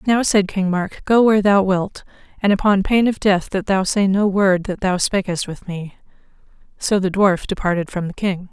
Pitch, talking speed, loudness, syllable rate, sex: 190 Hz, 210 wpm, -18 LUFS, 4.9 syllables/s, female